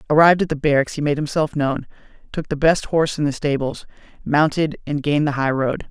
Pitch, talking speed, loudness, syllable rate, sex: 145 Hz, 215 wpm, -19 LUFS, 6.1 syllables/s, male